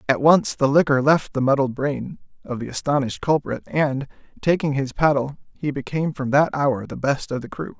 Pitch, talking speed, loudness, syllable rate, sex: 140 Hz, 200 wpm, -21 LUFS, 5.2 syllables/s, male